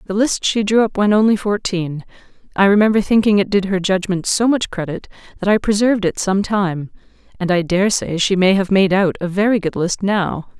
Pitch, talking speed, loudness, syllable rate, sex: 195 Hz, 210 wpm, -16 LUFS, 5.3 syllables/s, female